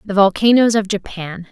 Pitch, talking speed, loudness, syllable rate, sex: 200 Hz, 160 wpm, -15 LUFS, 5.0 syllables/s, female